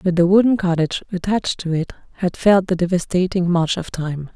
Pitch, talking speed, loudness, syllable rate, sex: 180 Hz, 195 wpm, -19 LUFS, 5.7 syllables/s, female